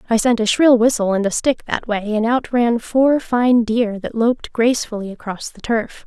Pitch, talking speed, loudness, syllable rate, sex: 230 Hz, 220 wpm, -18 LUFS, 4.8 syllables/s, female